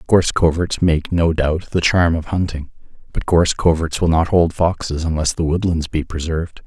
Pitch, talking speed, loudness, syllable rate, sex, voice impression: 80 Hz, 190 wpm, -18 LUFS, 5.1 syllables/s, male, masculine, adult-like, slightly thick, slightly dark, slightly fluent, sincere, calm